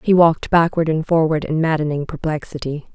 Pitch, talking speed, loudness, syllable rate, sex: 155 Hz, 165 wpm, -18 LUFS, 5.6 syllables/s, female